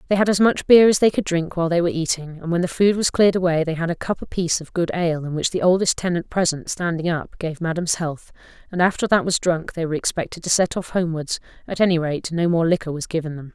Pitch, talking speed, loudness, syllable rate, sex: 170 Hz, 270 wpm, -20 LUFS, 6.5 syllables/s, female